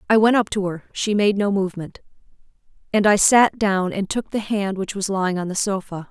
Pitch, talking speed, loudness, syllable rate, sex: 200 Hz, 225 wpm, -20 LUFS, 5.4 syllables/s, female